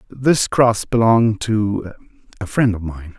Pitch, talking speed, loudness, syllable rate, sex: 110 Hz, 150 wpm, -17 LUFS, 4.0 syllables/s, male